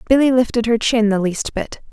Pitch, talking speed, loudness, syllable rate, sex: 230 Hz, 220 wpm, -17 LUFS, 5.4 syllables/s, female